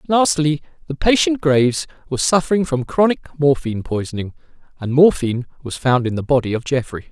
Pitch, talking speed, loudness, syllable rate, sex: 145 Hz, 160 wpm, -18 LUFS, 5.7 syllables/s, male